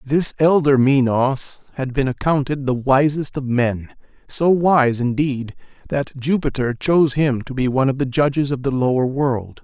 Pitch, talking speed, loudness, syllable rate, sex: 135 Hz, 160 wpm, -19 LUFS, 4.5 syllables/s, male